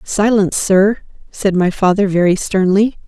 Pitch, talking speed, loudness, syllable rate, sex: 195 Hz, 135 wpm, -14 LUFS, 4.7 syllables/s, female